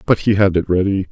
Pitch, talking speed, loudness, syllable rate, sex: 95 Hz, 270 wpm, -16 LUFS, 6.3 syllables/s, male